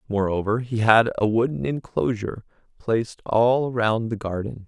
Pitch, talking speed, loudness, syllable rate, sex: 110 Hz, 140 wpm, -22 LUFS, 4.7 syllables/s, male